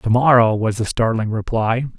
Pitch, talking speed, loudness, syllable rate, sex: 115 Hz, 180 wpm, -17 LUFS, 4.8 syllables/s, male